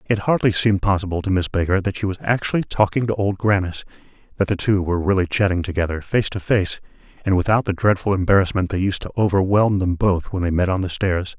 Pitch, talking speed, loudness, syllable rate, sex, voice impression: 95 Hz, 220 wpm, -20 LUFS, 6.1 syllables/s, male, masculine, middle-aged, thick, tensed, powerful, intellectual, sincere, calm, mature, friendly, reassuring, unique, wild